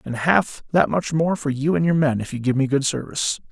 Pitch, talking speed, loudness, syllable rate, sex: 145 Hz, 275 wpm, -21 LUFS, 5.6 syllables/s, male